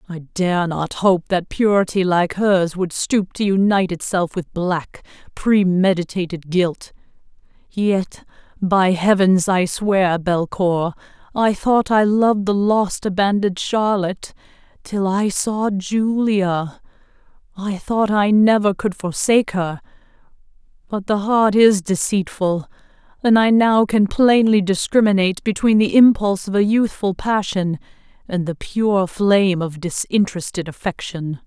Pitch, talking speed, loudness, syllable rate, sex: 195 Hz, 125 wpm, -18 LUFS, 4.1 syllables/s, female